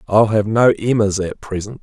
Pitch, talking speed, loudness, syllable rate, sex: 105 Hz, 195 wpm, -17 LUFS, 4.8 syllables/s, male